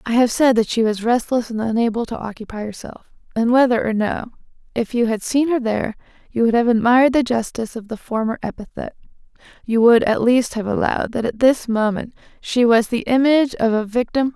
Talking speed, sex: 215 wpm, female